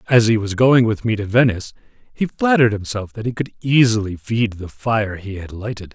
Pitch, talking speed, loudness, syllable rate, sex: 110 Hz, 210 wpm, -18 LUFS, 5.5 syllables/s, male